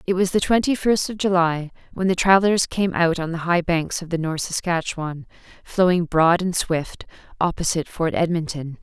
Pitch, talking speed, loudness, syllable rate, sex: 175 Hz, 185 wpm, -21 LUFS, 5.1 syllables/s, female